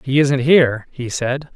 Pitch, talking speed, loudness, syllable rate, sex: 135 Hz, 195 wpm, -17 LUFS, 4.3 syllables/s, male